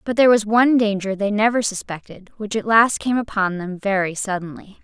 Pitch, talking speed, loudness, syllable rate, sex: 210 Hz, 200 wpm, -19 LUFS, 5.6 syllables/s, female